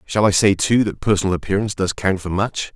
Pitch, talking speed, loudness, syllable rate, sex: 100 Hz, 240 wpm, -19 LUFS, 6.1 syllables/s, male